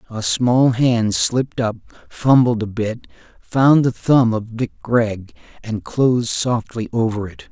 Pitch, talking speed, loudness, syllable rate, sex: 115 Hz, 150 wpm, -18 LUFS, 3.9 syllables/s, male